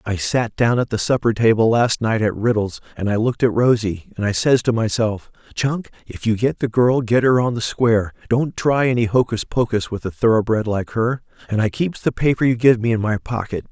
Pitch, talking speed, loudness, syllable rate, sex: 115 Hz, 230 wpm, -19 LUFS, 5.3 syllables/s, male